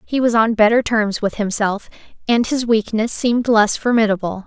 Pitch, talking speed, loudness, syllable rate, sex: 220 Hz, 175 wpm, -17 LUFS, 5.0 syllables/s, female